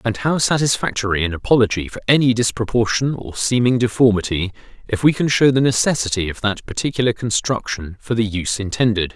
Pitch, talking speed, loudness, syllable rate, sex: 115 Hz, 165 wpm, -18 LUFS, 5.9 syllables/s, male